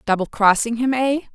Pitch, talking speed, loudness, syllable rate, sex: 235 Hz, 180 wpm, -19 LUFS, 5.3 syllables/s, female